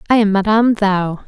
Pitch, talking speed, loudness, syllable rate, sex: 205 Hz, 190 wpm, -15 LUFS, 5.7 syllables/s, female